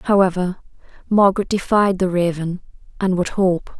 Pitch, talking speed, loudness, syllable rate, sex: 185 Hz, 125 wpm, -19 LUFS, 4.8 syllables/s, female